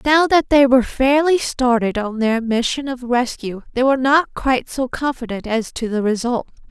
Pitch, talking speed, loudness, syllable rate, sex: 250 Hz, 190 wpm, -18 LUFS, 4.9 syllables/s, female